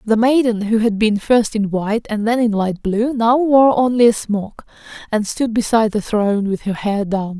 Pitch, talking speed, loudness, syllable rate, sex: 220 Hz, 220 wpm, -17 LUFS, 4.9 syllables/s, female